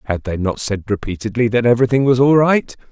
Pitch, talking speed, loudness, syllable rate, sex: 115 Hz, 205 wpm, -16 LUFS, 6.3 syllables/s, male